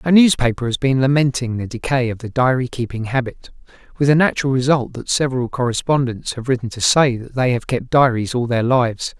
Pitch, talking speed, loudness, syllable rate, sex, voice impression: 125 Hz, 200 wpm, -18 LUFS, 5.8 syllables/s, male, very masculine, middle-aged, very thick, tensed, slightly powerful, bright, slightly soft, clear, fluent, slightly raspy, slightly cool, intellectual, refreshing, slightly sincere, calm, slightly mature, friendly, reassuring, slightly unique, slightly elegant, wild, slightly sweet, lively, kind, slightly intense